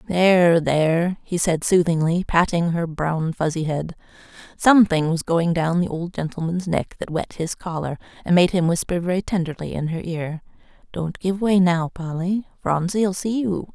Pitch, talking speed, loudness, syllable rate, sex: 170 Hz, 170 wpm, -21 LUFS, 4.7 syllables/s, female